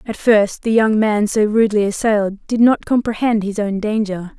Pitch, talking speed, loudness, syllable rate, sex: 215 Hz, 190 wpm, -16 LUFS, 4.9 syllables/s, female